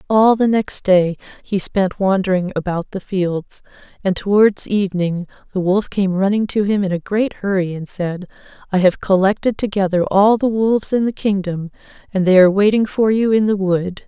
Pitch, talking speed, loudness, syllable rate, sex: 195 Hz, 190 wpm, -17 LUFS, 5.0 syllables/s, female